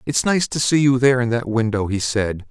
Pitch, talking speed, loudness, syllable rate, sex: 120 Hz, 265 wpm, -18 LUFS, 5.5 syllables/s, male